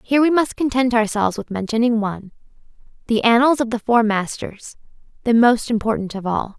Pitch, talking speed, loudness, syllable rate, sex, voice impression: 230 Hz, 175 wpm, -18 LUFS, 5.7 syllables/s, female, feminine, young, slightly bright, fluent, cute, friendly, slightly lively, slightly kind